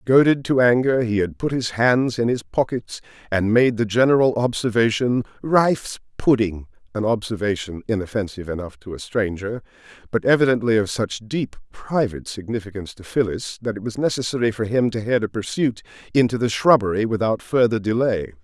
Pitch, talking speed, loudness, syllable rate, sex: 115 Hz, 160 wpm, -21 LUFS, 5.4 syllables/s, male